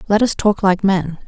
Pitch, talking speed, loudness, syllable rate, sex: 190 Hz, 235 wpm, -16 LUFS, 4.9 syllables/s, female